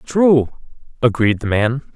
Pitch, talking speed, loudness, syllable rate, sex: 125 Hz, 125 wpm, -16 LUFS, 4.0 syllables/s, male